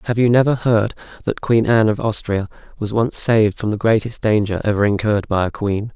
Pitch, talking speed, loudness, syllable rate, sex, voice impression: 110 Hz, 210 wpm, -18 LUFS, 5.8 syllables/s, male, very masculine, very adult-like, very middle-aged, very thick, slightly tensed, slightly powerful, slightly dark, soft, fluent, very cool, intellectual, very sincere, calm, friendly, reassuring, elegant, slightly wild, sweet, very kind, very modest